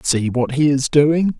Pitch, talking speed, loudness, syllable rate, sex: 140 Hz, 215 wpm, -16 LUFS, 3.9 syllables/s, male